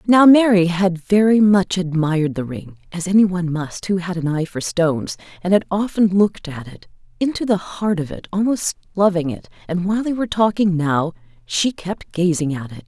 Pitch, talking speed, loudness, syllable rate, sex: 180 Hz, 190 wpm, -18 LUFS, 5.2 syllables/s, female